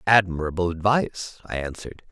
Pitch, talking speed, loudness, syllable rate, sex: 95 Hz, 115 wpm, -24 LUFS, 5.9 syllables/s, male